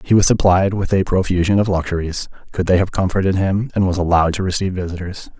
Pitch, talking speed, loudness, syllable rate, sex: 95 Hz, 210 wpm, -18 LUFS, 6.4 syllables/s, male